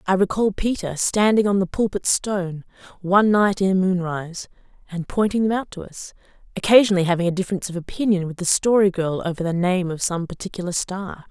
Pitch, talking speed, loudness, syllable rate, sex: 185 Hz, 185 wpm, -21 LUFS, 5.9 syllables/s, female